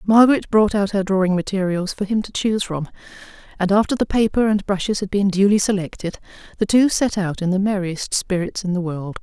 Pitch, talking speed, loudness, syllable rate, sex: 195 Hz, 210 wpm, -19 LUFS, 5.7 syllables/s, female